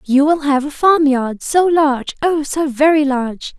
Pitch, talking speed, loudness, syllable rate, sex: 290 Hz, 200 wpm, -15 LUFS, 4.5 syllables/s, female